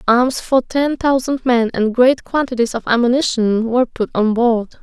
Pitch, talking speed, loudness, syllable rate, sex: 240 Hz, 175 wpm, -16 LUFS, 4.7 syllables/s, female